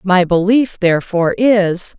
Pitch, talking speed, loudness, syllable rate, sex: 195 Hz, 120 wpm, -14 LUFS, 4.4 syllables/s, female